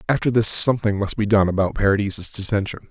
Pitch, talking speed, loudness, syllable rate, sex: 105 Hz, 185 wpm, -19 LUFS, 6.4 syllables/s, male